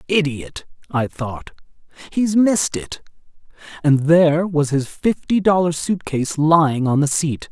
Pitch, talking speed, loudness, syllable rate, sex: 160 Hz, 145 wpm, -18 LUFS, 4.2 syllables/s, male